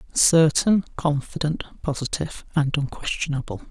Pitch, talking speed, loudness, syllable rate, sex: 150 Hz, 80 wpm, -23 LUFS, 5.0 syllables/s, male